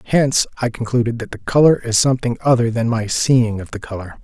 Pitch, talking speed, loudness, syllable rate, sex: 120 Hz, 215 wpm, -17 LUFS, 6.0 syllables/s, male